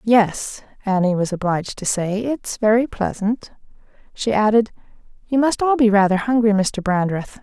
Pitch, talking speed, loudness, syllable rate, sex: 215 Hz, 155 wpm, -19 LUFS, 4.7 syllables/s, female